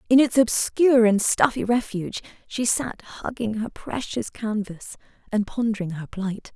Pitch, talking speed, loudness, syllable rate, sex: 220 Hz, 145 wpm, -23 LUFS, 4.6 syllables/s, female